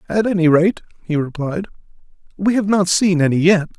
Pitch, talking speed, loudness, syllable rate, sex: 180 Hz, 175 wpm, -17 LUFS, 5.3 syllables/s, male